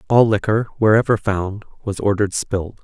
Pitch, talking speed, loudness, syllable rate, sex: 105 Hz, 150 wpm, -18 LUFS, 5.6 syllables/s, male